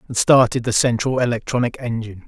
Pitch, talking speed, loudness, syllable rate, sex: 120 Hz, 160 wpm, -18 LUFS, 6.2 syllables/s, male